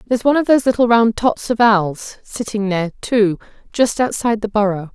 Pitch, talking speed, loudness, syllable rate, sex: 220 Hz, 195 wpm, -16 LUFS, 5.9 syllables/s, female